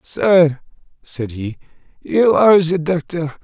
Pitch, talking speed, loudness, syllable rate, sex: 160 Hz, 120 wpm, -15 LUFS, 3.7 syllables/s, male